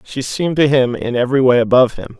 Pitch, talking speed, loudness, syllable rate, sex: 130 Hz, 245 wpm, -15 LUFS, 6.8 syllables/s, male